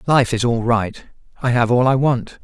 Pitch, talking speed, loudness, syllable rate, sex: 120 Hz, 220 wpm, -17 LUFS, 4.7 syllables/s, male